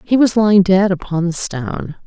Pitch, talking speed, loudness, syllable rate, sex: 190 Hz, 205 wpm, -15 LUFS, 5.3 syllables/s, female